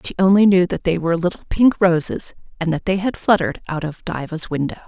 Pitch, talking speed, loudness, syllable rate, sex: 175 Hz, 220 wpm, -18 LUFS, 6.1 syllables/s, female